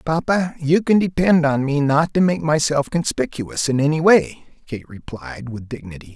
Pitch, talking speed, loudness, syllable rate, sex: 150 Hz, 175 wpm, -18 LUFS, 4.7 syllables/s, male